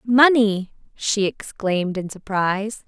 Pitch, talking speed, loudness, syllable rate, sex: 205 Hz, 105 wpm, -21 LUFS, 3.9 syllables/s, female